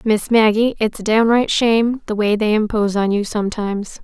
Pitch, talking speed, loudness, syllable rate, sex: 215 Hz, 180 wpm, -17 LUFS, 5.5 syllables/s, female